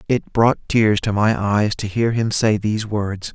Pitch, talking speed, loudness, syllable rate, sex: 105 Hz, 215 wpm, -19 LUFS, 4.2 syllables/s, male